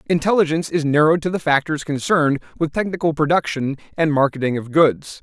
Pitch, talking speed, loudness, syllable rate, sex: 155 Hz, 160 wpm, -19 LUFS, 6.2 syllables/s, male